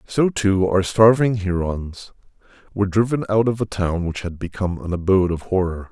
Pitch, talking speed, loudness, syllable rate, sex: 95 Hz, 185 wpm, -20 LUFS, 5.3 syllables/s, male